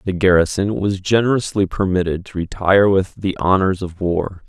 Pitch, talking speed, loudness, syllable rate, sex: 95 Hz, 160 wpm, -18 LUFS, 5.1 syllables/s, male